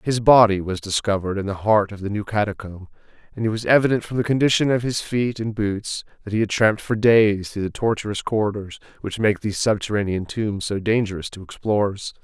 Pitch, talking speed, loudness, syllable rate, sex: 105 Hz, 205 wpm, -21 LUFS, 5.7 syllables/s, male